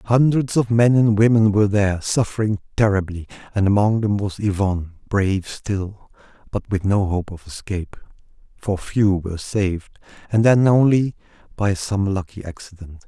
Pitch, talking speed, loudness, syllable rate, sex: 100 Hz, 150 wpm, -19 LUFS, 4.9 syllables/s, male